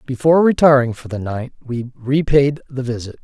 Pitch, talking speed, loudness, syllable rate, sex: 130 Hz, 165 wpm, -17 LUFS, 5.4 syllables/s, male